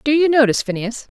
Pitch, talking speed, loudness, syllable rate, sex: 260 Hz, 200 wpm, -16 LUFS, 7.1 syllables/s, female